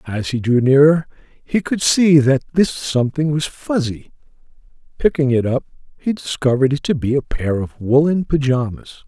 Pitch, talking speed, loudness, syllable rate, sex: 140 Hz, 165 wpm, -17 LUFS, 5.0 syllables/s, male